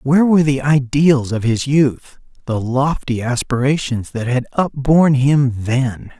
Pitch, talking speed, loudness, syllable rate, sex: 135 Hz, 145 wpm, -16 LUFS, 4.2 syllables/s, male